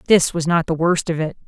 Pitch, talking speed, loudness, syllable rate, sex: 165 Hz, 285 wpm, -19 LUFS, 5.7 syllables/s, female